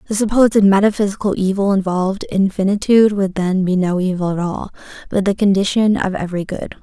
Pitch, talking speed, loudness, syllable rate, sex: 195 Hz, 175 wpm, -16 LUFS, 6.0 syllables/s, female